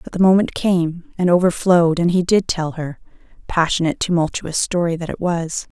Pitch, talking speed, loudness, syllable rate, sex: 170 Hz, 165 wpm, -18 LUFS, 5.3 syllables/s, female